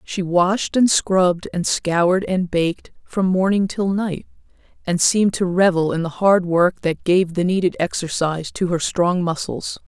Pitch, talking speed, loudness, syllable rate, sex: 180 Hz, 175 wpm, -19 LUFS, 4.4 syllables/s, female